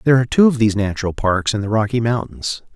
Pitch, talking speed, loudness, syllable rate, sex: 110 Hz, 240 wpm, -18 LUFS, 7.1 syllables/s, male